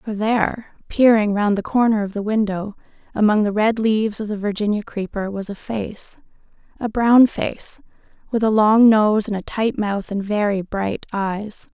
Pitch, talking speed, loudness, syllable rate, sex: 210 Hz, 180 wpm, -19 LUFS, 4.6 syllables/s, female